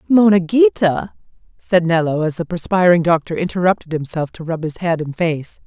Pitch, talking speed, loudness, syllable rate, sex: 175 Hz, 170 wpm, -17 LUFS, 5.1 syllables/s, female